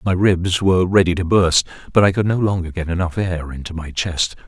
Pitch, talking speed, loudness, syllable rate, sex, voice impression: 90 Hz, 230 wpm, -18 LUFS, 5.5 syllables/s, male, very masculine, middle-aged, very thick, slightly tensed, very powerful, slightly dark, soft, very muffled, fluent, slightly raspy, very cool, intellectual, slightly refreshing, slightly sincere, very calm, very mature, very friendly, very reassuring, very unique, slightly elegant, wild, very sweet, slightly lively, slightly kind, slightly intense, modest